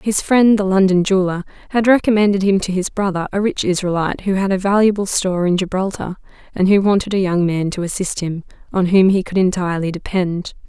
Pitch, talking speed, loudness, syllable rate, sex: 190 Hz, 200 wpm, -17 LUFS, 6.0 syllables/s, female